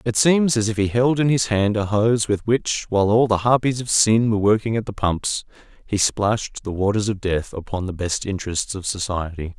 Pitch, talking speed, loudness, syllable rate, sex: 105 Hz, 225 wpm, -20 LUFS, 5.2 syllables/s, male